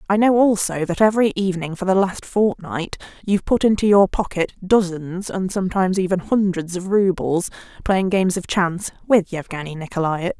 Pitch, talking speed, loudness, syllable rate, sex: 185 Hz, 165 wpm, -20 LUFS, 5.4 syllables/s, female